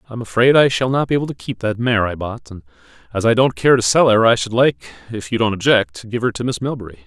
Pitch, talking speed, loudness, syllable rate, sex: 115 Hz, 280 wpm, -17 LUFS, 6.7 syllables/s, male